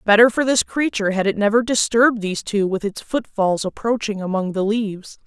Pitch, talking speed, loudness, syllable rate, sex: 215 Hz, 195 wpm, -19 LUFS, 5.7 syllables/s, female